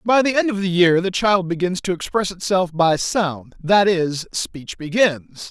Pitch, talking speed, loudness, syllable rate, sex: 180 Hz, 185 wpm, -19 LUFS, 4.1 syllables/s, male